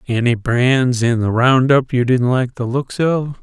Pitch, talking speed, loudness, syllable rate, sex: 125 Hz, 210 wpm, -16 LUFS, 4.0 syllables/s, male